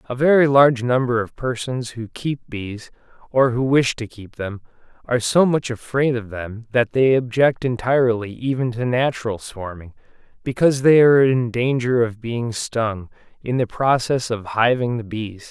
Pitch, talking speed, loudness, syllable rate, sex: 120 Hz, 170 wpm, -19 LUFS, 4.7 syllables/s, male